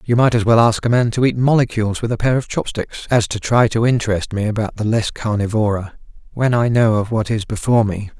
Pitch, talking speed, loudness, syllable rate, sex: 110 Hz, 250 wpm, -17 LUFS, 6.0 syllables/s, male